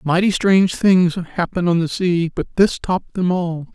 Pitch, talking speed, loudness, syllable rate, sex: 175 Hz, 190 wpm, -18 LUFS, 4.6 syllables/s, male